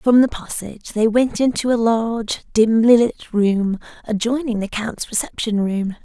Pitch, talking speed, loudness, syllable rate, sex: 225 Hz, 160 wpm, -19 LUFS, 4.5 syllables/s, female